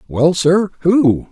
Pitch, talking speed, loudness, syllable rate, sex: 170 Hz, 135 wpm, -14 LUFS, 3.0 syllables/s, male